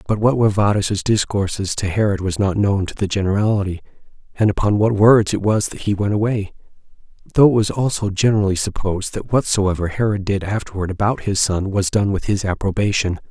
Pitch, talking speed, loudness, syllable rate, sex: 100 Hz, 190 wpm, -18 LUFS, 5.8 syllables/s, male